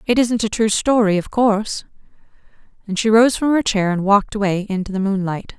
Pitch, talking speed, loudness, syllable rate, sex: 210 Hz, 205 wpm, -18 LUFS, 5.7 syllables/s, female